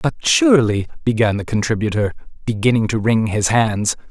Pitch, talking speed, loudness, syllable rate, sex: 115 Hz, 145 wpm, -17 LUFS, 5.3 syllables/s, male